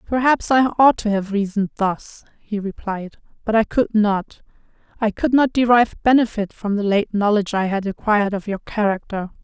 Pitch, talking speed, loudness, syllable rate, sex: 215 Hz, 180 wpm, -19 LUFS, 5.2 syllables/s, female